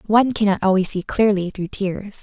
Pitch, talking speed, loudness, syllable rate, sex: 200 Hz, 160 wpm, -20 LUFS, 5.3 syllables/s, female